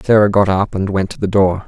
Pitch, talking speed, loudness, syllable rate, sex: 100 Hz, 285 wpm, -15 LUFS, 5.7 syllables/s, male